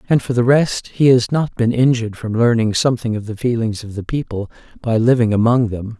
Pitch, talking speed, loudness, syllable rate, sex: 115 Hz, 220 wpm, -17 LUFS, 5.7 syllables/s, male